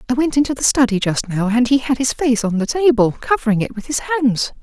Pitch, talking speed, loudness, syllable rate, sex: 245 Hz, 260 wpm, -17 LUFS, 5.8 syllables/s, female